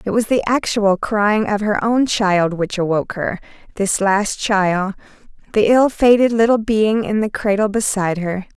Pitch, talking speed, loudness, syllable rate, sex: 205 Hz, 160 wpm, -17 LUFS, 4.5 syllables/s, female